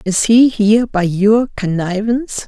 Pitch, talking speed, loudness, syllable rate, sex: 215 Hz, 145 wpm, -14 LUFS, 4.4 syllables/s, female